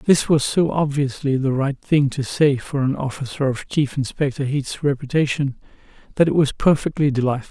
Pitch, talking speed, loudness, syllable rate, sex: 140 Hz, 175 wpm, -20 LUFS, 5.2 syllables/s, male